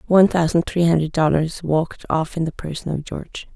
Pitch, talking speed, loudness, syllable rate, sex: 165 Hz, 200 wpm, -20 LUFS, 5.8 syllables/s, female